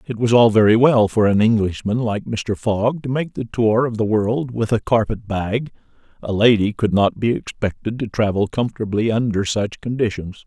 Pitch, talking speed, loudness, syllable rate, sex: 110 Hz, 195 wpm, -19 LUFS, 4.9 syllables/s, male